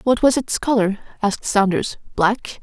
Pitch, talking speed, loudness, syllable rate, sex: 220 Hz, 160 wpm, -19 LUFS, 4.7 syllables/s, female